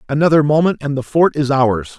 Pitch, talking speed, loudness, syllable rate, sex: 140 Hz, 210 wpm, -15 LUFS, 5.5 syllables/s, male